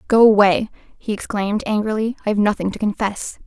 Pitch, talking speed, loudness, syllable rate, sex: 210 Hz, 175 wpm, -18 LUFS, 5.5 syllables/s, female